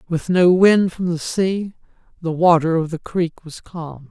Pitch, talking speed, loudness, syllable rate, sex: 170 Hz, 190 wpm, -18 LUFS, 4.0 syllables/s, male